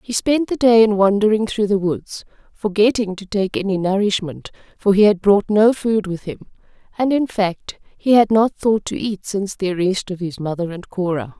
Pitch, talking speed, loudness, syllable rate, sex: 200 Hz, 205 wpm, -18 LUFS, 4.9 syllables/s, female